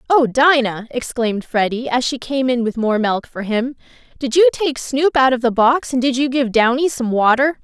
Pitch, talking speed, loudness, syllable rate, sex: 255 Hz, 220 wpm, -17 LUFS, 4.9 syllables/s, female